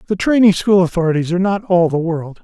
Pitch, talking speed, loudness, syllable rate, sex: 180 Hz, 220 wpm, -15 LUFS, 6.3 syllables/s, male